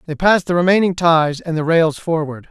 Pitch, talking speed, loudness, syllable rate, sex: 165 Hz, 215 wpm, -16 LUFS, 5.5 syllables/s, male